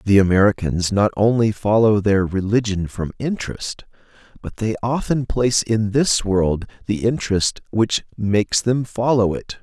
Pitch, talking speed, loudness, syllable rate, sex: 105 Hz, 145 wpm, -19 LUFS, 4.6 syllables/s, male